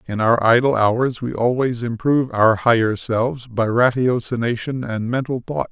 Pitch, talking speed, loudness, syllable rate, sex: 120 Hz, 155 wpm, -19 LUFS, 4.8 syllables/s, male